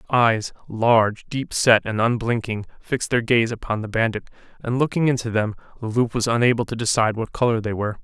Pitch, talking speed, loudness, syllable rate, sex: 115 Hz, 195 wpm, -21 LUFS, 5.9 syllables/s, male